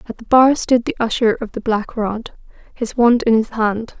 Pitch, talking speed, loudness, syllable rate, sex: 230 Hz, 225 wpm, -17 LUFS, 4.7 syllables/s, female